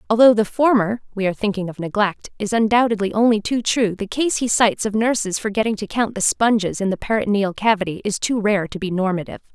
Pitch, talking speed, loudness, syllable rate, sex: 210 Hz, 215 wpm, -19 LUFS, 5.8 syllables/s, female